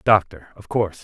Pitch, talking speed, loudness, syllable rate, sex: 95 Hz, 175 wpm, -21 LUFS, 5.8 syllables/s, male